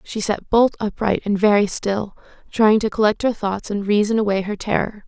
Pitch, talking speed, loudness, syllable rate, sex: 210 Hz, 200 wpm, -19 LUFS, 5.1 syllables/s, female